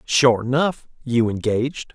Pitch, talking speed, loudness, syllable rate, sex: 125 Hz, 125 wpm, -20 LUFS, 4.1 syllables/s, male